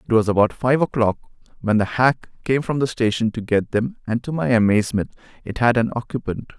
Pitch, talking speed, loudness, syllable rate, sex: 120 Hz, 210 wpm, -20 LUFS, 5.6 syllables/s, male